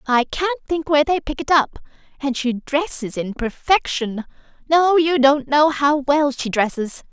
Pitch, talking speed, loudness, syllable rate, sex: 285 Hz, 170 wpm, -19 LUFS, 4.4 syllables/s, female